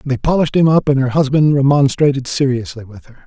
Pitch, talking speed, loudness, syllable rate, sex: 135 Hz, 200 wpm, -14 LUFS, 6.1 syllables/s, male